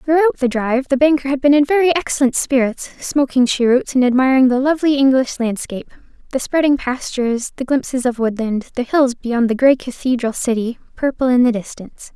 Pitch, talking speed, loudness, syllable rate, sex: 260 Hz, 185 wpm, -16 LUFS, 5.7 syllables/s, female